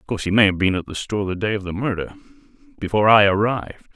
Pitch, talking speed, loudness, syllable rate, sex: 105 Hz, 245 wpm, -19 LUFS, 7.7 syllables/s, male